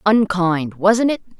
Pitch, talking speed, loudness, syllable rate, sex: 195 Hz, 130 wpm, -17 LUFS, 3.5 syllables/s, female